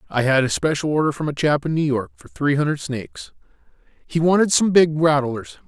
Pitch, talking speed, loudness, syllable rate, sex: 150 Hz, 200 wpm, -19 LUFS, 5.6 syllables/s, male